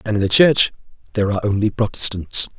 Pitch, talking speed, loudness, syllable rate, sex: 105 Hz, 185 wpm, -17 LUFS, 6.7 syllables/s, male